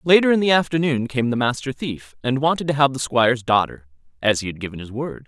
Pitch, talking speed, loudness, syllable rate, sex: 130 Hz, 240 wpm, -20 LUFS, 6.1 syllables/s, male